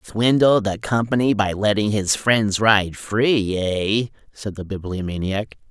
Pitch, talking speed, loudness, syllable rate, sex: 105 Hz, 135 wpm, -20 LUFS, 3.8 syllables/s, male